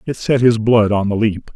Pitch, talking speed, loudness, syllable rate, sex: 110 Hz, 270 wpm, -15 LUFS, 5.0 syllables/s, male